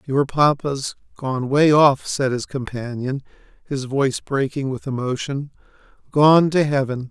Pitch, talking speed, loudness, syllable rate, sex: 135 Hz, 120 wpm, -20 LUFS, 4.2 syllables/s, male